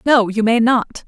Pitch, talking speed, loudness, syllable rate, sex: 230 Hz, 225 wpm, -15 LUFS, 4.3 syllables/s, female